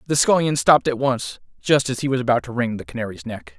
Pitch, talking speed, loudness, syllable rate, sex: 130 Hz, 250 wpm, -20 LUFS, 6.2 syllables/s, male